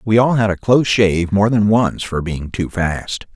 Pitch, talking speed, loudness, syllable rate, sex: 100 Hz, 230 wpm, -16 LUFS, 4.7 syllables/s, male